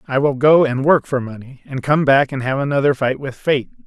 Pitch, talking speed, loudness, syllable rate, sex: 135 Hz, 250 wpm, -17 LUFS, 5.4 syllables/s, male